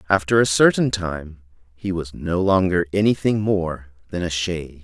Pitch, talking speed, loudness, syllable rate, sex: 90 Hz, 160 wpm, -20 LUFS, 4.7 syllables/s, male